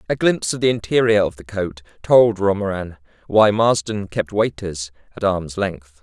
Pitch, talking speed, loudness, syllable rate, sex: 100 Hz, 170 wpm, -19 LUFS, 4.7 syllables/s, male